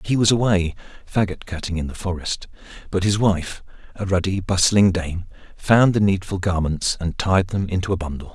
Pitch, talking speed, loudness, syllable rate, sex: 95 Hz, 180 wpm, -21 LUFS, 5.1 syllables/s, male